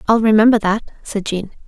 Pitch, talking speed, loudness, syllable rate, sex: 215 Hz, 180 wpm, -16 LUFS, 5.9 syllables/s, female